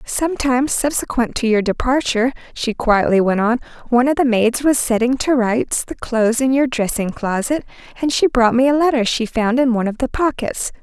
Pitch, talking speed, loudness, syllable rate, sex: 245 Hz, 205 wpm, -17 LUFS, 5.2 syllables/s, female